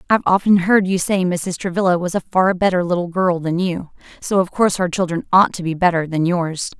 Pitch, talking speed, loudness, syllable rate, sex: 180 Hz, 230 wpm, -18 LUFS, 5.7 syllables/s, female